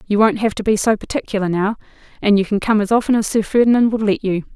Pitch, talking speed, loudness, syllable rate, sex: 210 Hz, 265 wpm, -17 LUFS, 6.6 syllables/s, female